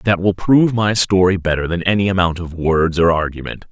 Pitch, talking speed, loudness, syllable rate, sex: 90 Hz, 210 wpm, -16 LUFS, 5.5 syllables/s, male